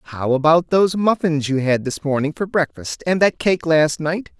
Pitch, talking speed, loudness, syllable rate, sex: 155 Hz, 205 wpm, -18 LUFS, 4.6 syllables/s, male